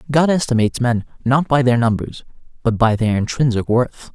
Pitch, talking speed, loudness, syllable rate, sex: 125 Hz, 175 wpm, -17 LUFS, 5.4 syllables/s, male